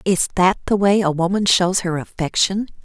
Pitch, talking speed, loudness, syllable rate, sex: 185 Hz, 190 wpm, -18 LUFS, 5.0 syllables/s, female